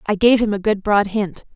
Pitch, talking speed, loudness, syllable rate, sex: 205 Hz, 270 wpm, -18 LUFS, 5.2 syllables/s, female